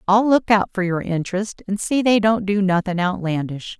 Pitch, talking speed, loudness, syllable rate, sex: 195 Hz, 205 wpm, -20 LUFS, 5.1 syllables/s, female